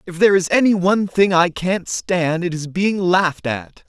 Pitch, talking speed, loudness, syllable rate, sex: 180 Hz, 215 wpm, -18 LUFS, 4.8 syllables/s, male